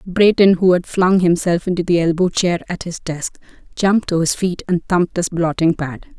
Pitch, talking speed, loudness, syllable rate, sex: 175 Hz, 205 wpm, -17 LUFS, 5.1 syllables/s, female